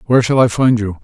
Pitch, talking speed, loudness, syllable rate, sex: 120 Hz, 290 wpm, -13 LUFS, 6.9 syllables/s, male